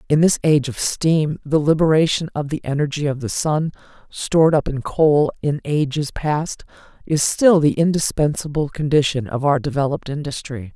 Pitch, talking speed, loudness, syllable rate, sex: 150 Hz, 160 wpm, -19 LUFS, 5.1 syllables/s, female